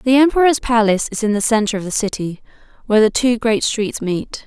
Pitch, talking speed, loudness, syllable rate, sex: 225 Hz, 215 wpm, -17 LUFS, 5.8 syllables/s, female